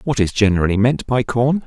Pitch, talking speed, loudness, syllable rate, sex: 120 Hz, 215 wpm, -17 LUFS, 5.7 syllables/s, male